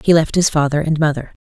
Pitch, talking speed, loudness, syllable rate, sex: 155 Hz, 250 wpm, -16 LUFS, 6.3 syllables/s, female